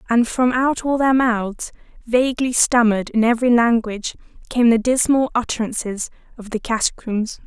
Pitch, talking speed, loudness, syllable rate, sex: 235 Hz, 145 wpm, -18 LUFS, 5.1 syllables/s, female